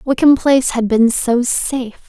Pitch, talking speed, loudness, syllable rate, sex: 250 Hz, 175 wpm, -14 LUFS, 4.6 syllables/s, female